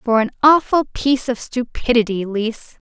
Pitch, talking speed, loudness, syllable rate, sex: 240 Hz, 145 wpm, -18 LUFS, 4.5 syllables/s, female